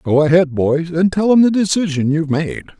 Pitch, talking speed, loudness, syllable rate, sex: 165 Hz, 215 wpm, -15 LUFS, 5.6 syllables/s, male